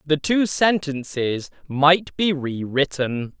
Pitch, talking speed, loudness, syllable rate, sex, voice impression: 155 Hz, 105 wpm, -21 LUFS, 3.2 syllables/s, male, masculine, adult-like, slightly thin, tensed, powerful, hard, clear, cool, intellectual, calm, wild, lively, slightly sharp